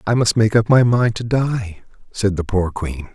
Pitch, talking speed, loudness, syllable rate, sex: 105 Hz, 230 wpm, -18 LUFS, 4.3 syllables/s, male